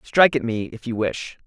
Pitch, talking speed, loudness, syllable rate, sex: 125 Hz, 245 wpm, -21 LUFS, 5.4 syllables/s, male